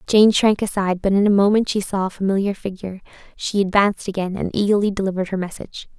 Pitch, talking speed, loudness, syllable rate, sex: 195 Hz, 200 wpm, -19 LUFS, 6.8 syllables/s, female